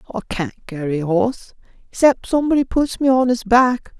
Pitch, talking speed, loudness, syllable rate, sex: 225 Hz, 180 wpm, -18 LUFS, 5.6 syllables/s, male